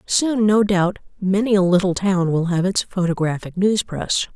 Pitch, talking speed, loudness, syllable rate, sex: 190 Hz, 180 wpm, -19 LUFS, 4.5 syllables/s, female